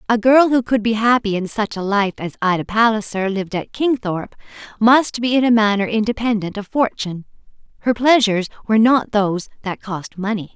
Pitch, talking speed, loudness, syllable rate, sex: 215 Hz, 180 wpm, -18 LUFS, 5.6 syllables/s, female